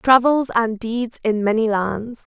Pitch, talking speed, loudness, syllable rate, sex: 230 Hz, 155 wpm, -19 LUFS, 3.8 syllables/s, female